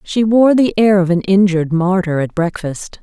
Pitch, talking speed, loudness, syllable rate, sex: 190 Hz, 200 wpm, -14 LUFS, 4.8 syllables/s, female